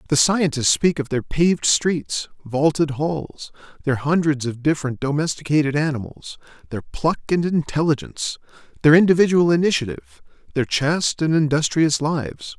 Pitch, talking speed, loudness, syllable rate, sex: 150 Hz, 130 wpm, -20 LUFS, 5.2 syllables/s, male